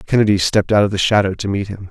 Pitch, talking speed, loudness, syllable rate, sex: 100 Hz, 285 wpm, -16 LUFS, 7.3 syllables/s, male